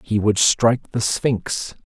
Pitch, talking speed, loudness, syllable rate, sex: 110 Hz, 160 wpm, -19 LUFS, 3.6 syllables/s, male